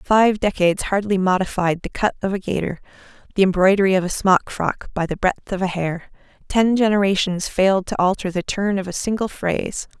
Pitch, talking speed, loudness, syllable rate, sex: 190 Hz, 190 wpm, -20 LUFS, 5.5 syllables/s, female